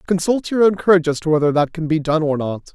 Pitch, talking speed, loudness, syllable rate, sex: 165 Hz, 285 wpm, -17 LUFS, 6.5 syllables/s, male